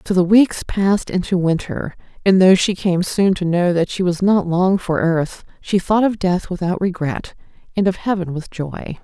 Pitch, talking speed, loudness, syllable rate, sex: 185 Hz, 205 wpm, -18 LUFS, 4.6 syllables/s, female